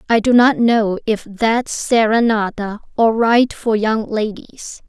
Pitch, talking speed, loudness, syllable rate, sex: 225 Hz, 150 wpm, -16 LUFS, 3.6 syllables/s, female